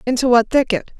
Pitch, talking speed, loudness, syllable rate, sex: 240 Hz, 180 wpm, -16 LUFS, 5.9 syllables/s, female